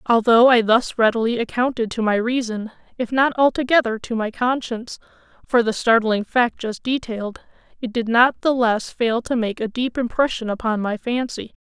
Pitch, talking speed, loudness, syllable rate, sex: 235 Hz, 175 wpm, -20 LUFS, 5.1 syllables/s, female